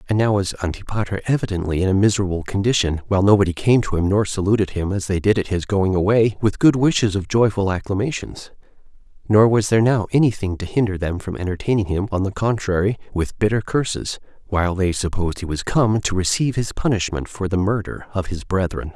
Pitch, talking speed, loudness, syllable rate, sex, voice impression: 100 Hz, 205 wpm, -20 LUFS, 6.1 syllables/s, male, very masculine, very middle-aged, very thick, slightly relaxed, very powerful, dark, slightly soft, muffled, slightly fluent, cool, slightly intellectual, slightly refreshing, sincere, very calm, mature, very friendly, reassuring, slightly unique, slightly elegant, wild, sweet, lively, kind, modest